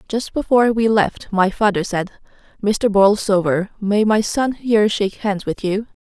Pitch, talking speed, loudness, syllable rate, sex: 205 Hz, 170 wpm, -18 LUFS, 4.7 syllables/s, female